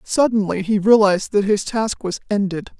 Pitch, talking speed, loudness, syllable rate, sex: 205 Hz, 170 wpm, -18 LUFS, 5.1 syllables/s, female